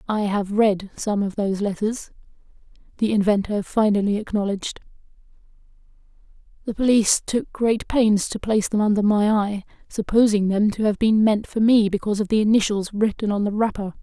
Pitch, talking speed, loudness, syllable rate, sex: 210 Hz, 165 wpm, -21 LUFS, 5.5 syllables/s, female